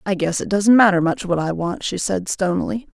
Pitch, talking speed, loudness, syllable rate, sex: 190 Hz, 245 wpm, -19 LUFS, 5.4 syllables/s, female